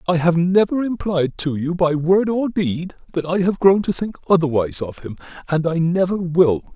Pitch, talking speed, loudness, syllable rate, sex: 175 Hz, 205 wpm, -19 LUFS, 5.0 syllables/s, male